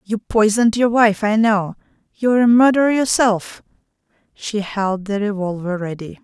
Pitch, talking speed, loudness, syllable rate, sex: 215 Hz, 155 wpm, -17 LUFS, 5.0 syllables/s, female